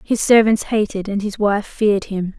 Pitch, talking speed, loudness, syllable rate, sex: 205 Hz, 200 wpm, -17 LUFS, 4.8 syllables/s, female